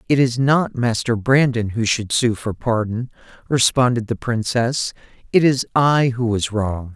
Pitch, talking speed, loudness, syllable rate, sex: 120 Hz, 165 wpm, -19 LUFS, 4.2 syllables/s, male